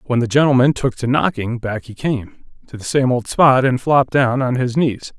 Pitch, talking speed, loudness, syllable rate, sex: 130 Hz, 220 wpm, -17 LUFS, 5.0 syllables/s, male